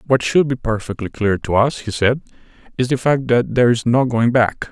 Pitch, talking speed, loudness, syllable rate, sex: 120 Hz, 230 wpm, -17 LUFS, 5.2 syllables/s, male